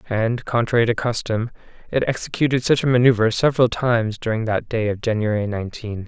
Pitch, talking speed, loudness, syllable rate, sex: 115 Hz, 170 wpm, -20 LUFS, 6.0 syllables/s, male